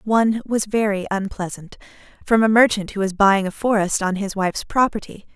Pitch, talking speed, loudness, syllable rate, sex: 205 Hz, 180 wpm, -19 LUFS, 5.5 syllables/s, female